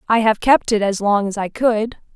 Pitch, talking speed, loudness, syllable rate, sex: 215 Hz, 250 wpm, -17 LUFS, 4.8 syllables/s, female